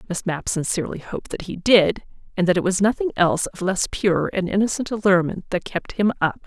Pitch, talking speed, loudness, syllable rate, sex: 190 Hz, 215 wpm, -21 LUFS, 5.8 syllables/s, female